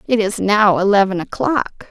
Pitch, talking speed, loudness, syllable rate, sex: 205 Hz, 155 wpm, -16 LUFS, 4.6 syllables/s, female